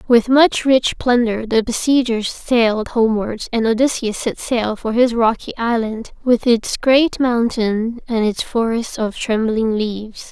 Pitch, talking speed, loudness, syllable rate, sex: 230 Hz, 150 wpm, -17 LUFS, 4.1 syllables/s, female